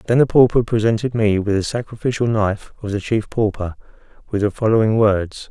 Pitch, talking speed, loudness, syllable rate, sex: 110 Hz, 185 wpm, -18 LUFS, 5.7 syllables/s, male